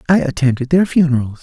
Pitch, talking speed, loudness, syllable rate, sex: 145 Hz, 170 wpm, -15 LUFS, 6.4 syllables/s, male